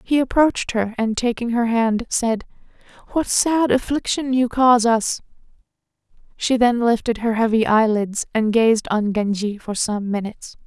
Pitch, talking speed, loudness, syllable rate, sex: 230 Hz, 150 wpm, -19 LUFS, 4.6 syllables/s, female